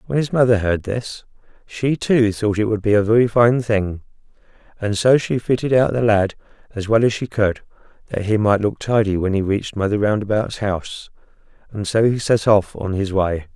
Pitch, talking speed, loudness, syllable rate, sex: 110 Hz, 205 wpm, -18 LUFS, 5.1 syllables/s, male